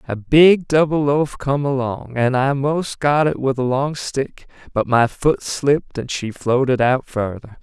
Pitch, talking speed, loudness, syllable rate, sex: 135 Hz, 190 wpm, -18 LUFS, 4.0 syllables/s, male